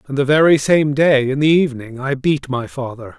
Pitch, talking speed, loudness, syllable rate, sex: 140 Hz, 225 wpm, -16 LUFS, 5.3 syllables/s, male